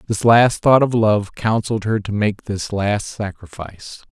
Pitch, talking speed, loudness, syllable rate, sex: 105 Hz, 175 wpm, -18 LUFS, 4.4 syllables/s, male